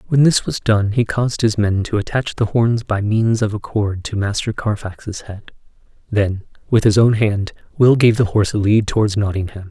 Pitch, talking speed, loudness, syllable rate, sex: 105 Hz, 210 wpm, -17 LUFS, 5.0 syllables/s, male